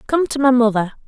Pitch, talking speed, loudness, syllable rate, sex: 250 Hz, 220 wpm, -16 LUFS, 6.3 syllables/s, female